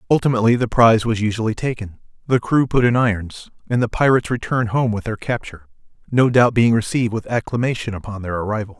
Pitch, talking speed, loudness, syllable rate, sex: 115 Hz, 190 wpm, -18 LUFS, 6.7 syllables/s, male